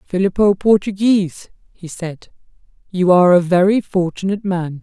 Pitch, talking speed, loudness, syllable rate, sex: 185 Hz, 125 wpm, -16 LUFS, 5.1 syllables/s, female